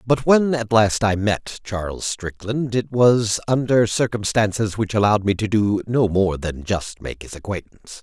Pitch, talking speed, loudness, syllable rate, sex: 110 Hz, 180 wpm, -20 LUFS, 4.5 syllables/s, male